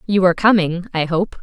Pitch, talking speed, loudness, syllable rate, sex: 180 Hz, 210 wpm, -17 LUFS, 5.7 syllables/s, female